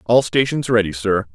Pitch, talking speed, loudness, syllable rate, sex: 110 Hz, 180 wpm, -18 LUFS, 5.1 syllables/s, male